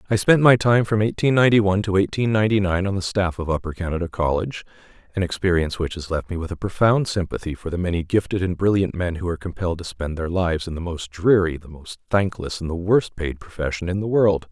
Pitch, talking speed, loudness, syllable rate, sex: 95 Hz, 240 wpm, -21 LUFS, 6.4 syllables/s, male